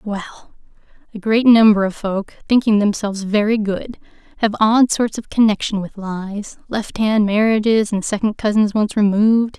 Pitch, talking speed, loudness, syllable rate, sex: 210 Hz, 155 wpm, -17 LUFS, 4.6 syllables/s, female